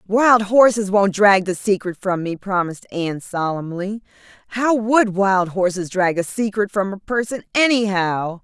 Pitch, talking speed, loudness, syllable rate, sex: 200 Hz, 155 wpm, -18 LUFS, 4.5 syllables/s, female